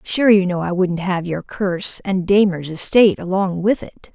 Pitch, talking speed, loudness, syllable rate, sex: 185 Hz, 205 wpm, -18 LUFS, 4.7 syllables/s, female